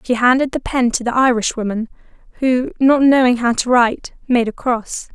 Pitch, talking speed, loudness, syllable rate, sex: 245 Hz, 200 wpm, -16 LUFS, 5.1 syllables/s, female